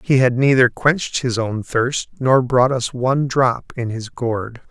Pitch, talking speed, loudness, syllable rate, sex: 125 Hz, 190 wpm, -18 LUFS, 4.0 syllables/s, male